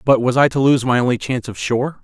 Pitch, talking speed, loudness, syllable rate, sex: 125 Hz, 295 wpm, -17 LUFS, 6.8 syllables/s, male